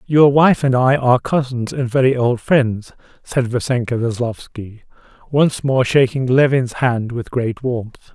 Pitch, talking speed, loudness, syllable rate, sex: 125 Hz, 155 wpm, -17 LUFS, 4.2 syllables/s, male